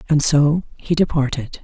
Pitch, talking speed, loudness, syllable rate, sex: 150 Hz, 145 wpm, -18 LUFS, 4.4 syllables/s, female